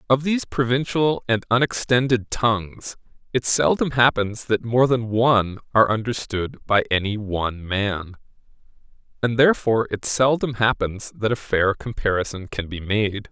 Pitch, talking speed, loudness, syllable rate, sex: 115 Hz, 140 wpm, -21 LUFS, 4.8 syllables/s, male